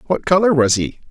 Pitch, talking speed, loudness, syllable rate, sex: 155 Hz, 215 wpm, -15 LUFS, 6.0 syllables/s, male